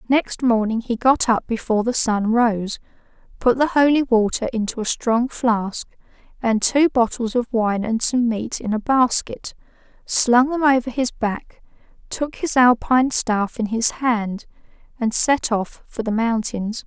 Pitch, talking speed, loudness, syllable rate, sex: 235 Hz, 165 wpm, -19 LUFS, 4.1 syllables/s, female